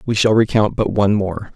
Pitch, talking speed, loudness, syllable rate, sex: 105 Hz, 230 wpm, -16 LUFS, 5.7 syllables/s, male